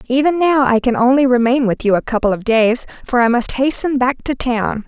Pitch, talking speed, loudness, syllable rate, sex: 250 Hz, 235 wpm, -15 LUFS, 5.3 syllables/s, female